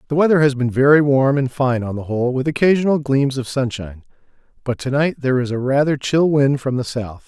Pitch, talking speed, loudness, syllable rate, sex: 135 Hz, 230 wpm, -18 LUFS, 5.9 syllables/s, male